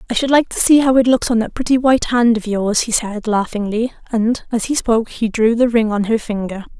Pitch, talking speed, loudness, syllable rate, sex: 230 Hz, 255 wpm, -16 LUFS, 5.7 syllables/s, female